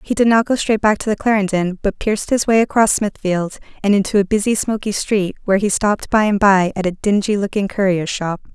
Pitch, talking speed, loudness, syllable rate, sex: 205 Hz, 230 wpm, -17 LUFS, 5.8 syllables/s, female